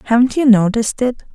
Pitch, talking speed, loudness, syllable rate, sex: 235 Hz, 180 wpm, -14 LUFS, 6.5 syllables/s, female